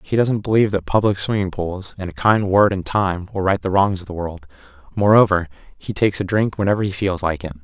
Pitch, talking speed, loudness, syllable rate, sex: 95 Hz, 235 wpm, -19 LUFS, 5.8 syllables/s, male